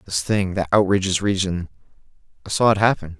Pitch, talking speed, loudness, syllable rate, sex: 95 Hz, 150 wpm, -20 LUFS, 5.8 syllables/s, male